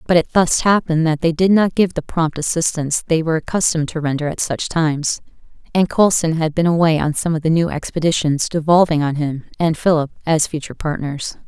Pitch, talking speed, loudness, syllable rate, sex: 160 Hz, 205 wpm, -17 LUFS, 5.9 syllables/s, female